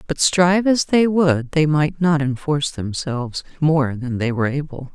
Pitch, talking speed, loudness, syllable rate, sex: 150 Hz, 180 wpm, -19 LUFS, 4.7 syllables/s, female